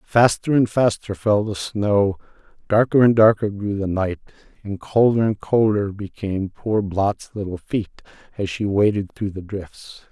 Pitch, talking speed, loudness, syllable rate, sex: 105 Hz, 160 wpm, -20 LUFS, 4.3 syllables/s, male